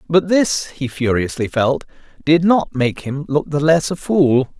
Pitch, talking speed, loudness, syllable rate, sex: 150 Hz, 185 wpm, -17 LUFS, 4.1 syllables/s, male